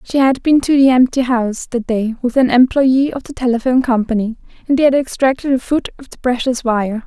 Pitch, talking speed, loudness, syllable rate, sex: 250 Hz, 220 wpm, -15 LUFS, 5.7 syllables/s, female